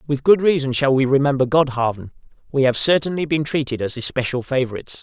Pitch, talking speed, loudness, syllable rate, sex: 135 Hz, 180 wpm, -19 LUFS, 6.1 syllables/s, male